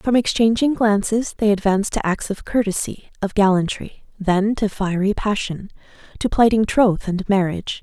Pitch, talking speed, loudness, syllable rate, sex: 205 Hz, 155 wpm, -19 LUFS, 4.8 syllables/s, female